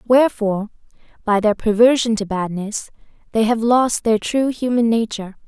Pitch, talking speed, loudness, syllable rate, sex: 225 Hz, 145 wpm, -18 LUFS, 5.1 syllables/s, female